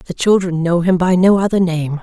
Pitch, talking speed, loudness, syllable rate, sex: 180 Hz, 235 wpm, -14 LUFS, 5.0 syllables/s, female